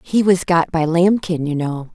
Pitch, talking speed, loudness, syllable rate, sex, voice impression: 170 Hz, 215 wpm, -17 LUFS, 4.4 syllables/s, female, very feminine, adult-like, slightly refreshing, friendly, kind